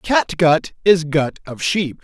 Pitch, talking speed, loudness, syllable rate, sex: 165 Hz, 145 wpm, -17 LUFS, 3.3 syllables/s, male